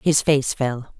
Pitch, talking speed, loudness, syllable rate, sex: 135 Hz, 180 wpm, -21 LUFS, 3.2 syllables/s, female